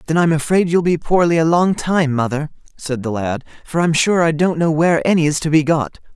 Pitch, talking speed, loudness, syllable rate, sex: 155 Hz, 245 wpm, -16 LUFS, 5.3 syllables/s, male